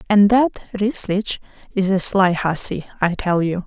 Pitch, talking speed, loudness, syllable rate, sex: 195 Hz, 165 wpm, -19 LUFS, 4.2 syllables/s, female